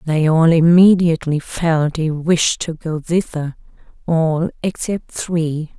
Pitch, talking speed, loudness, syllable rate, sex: 160 Hz, 125 wpm, -17 LUFS, 3.6 syllables/s, female